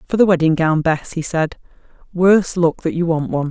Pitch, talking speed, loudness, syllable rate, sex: 165 Hz, 225 wpm, -17 LUFS, 5.7 syllables/s, female